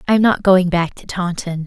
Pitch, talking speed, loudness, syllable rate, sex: 180 Hz, 255 wpm, -17 LUFS, 5.3 syllables/s, female